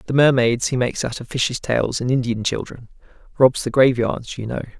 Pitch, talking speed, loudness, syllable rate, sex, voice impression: 125 Hz, 190 wpm, -20 LUFS, 5.5 syllables/s, male, masculine, adult-like, relaxed, powerful, raspy, intellectual, sincere, friendly, reassuring, slightly unique, kind, modest